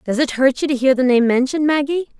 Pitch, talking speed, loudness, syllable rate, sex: 270 Hz, 275 wpm, -16 LUFS, 6.4 syllables/s, female